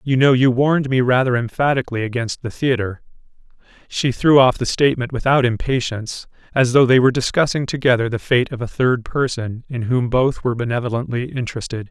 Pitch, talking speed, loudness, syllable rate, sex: 125 Hz, 175 wpm, -18 LUFS, 5.9 syllables/s, male